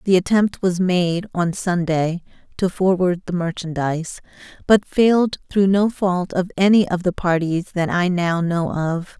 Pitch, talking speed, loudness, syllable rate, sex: 180 Hz, 165 wpm, -19 LUFS, 4.3 syllables/s, female